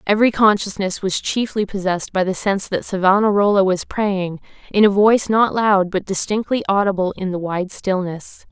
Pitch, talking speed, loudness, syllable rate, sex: 195 Hz, 170 wpm, -18 LUFS, 5.2 syllables/s, female